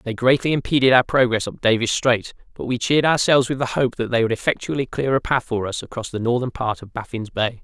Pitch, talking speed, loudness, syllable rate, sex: 120 Hz, 245 wpm, -20 LUFS, 6.2 syllables/s, male